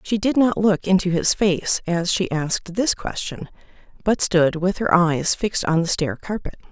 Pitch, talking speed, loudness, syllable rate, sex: 185 Hz, 195 wpm, -20 LUFS, 4.6 syllables/s, female